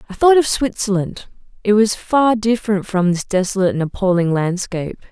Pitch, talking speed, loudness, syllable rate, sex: 205 Hz, 165 wpm, -17 LUFS, 5.6 syllables/s, female